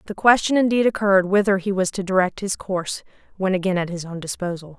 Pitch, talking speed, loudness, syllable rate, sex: 190 Hz, 215 wpm, -21 LUFS, 6.3 syllables/s, female